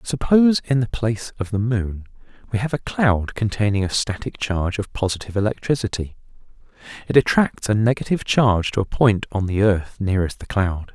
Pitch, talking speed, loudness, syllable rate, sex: 110 Hz, 170 wpm, -21 LUFS, 5.7 syllables/s, male